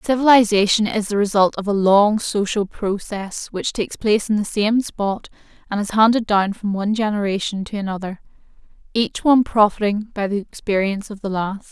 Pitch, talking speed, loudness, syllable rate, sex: 210 Hz, 175 wpm, -19 LUFS, 5.4 syllables/s, female